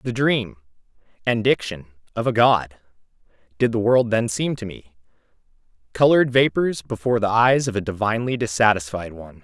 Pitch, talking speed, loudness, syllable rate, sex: 110 Hz, 140 wpm, -20 LUFS, 5.5 syllables/s, male